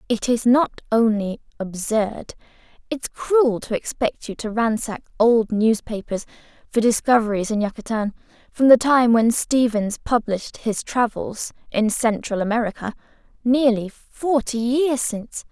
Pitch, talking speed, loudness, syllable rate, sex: 230 Hz, 125 wpm, -21 LUFS, 4.3 syllables/s, female